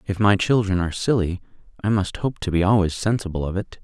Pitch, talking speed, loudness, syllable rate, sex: 95 Hz, 220 wpm, -22 LUFS, 6.0 syllables/s, male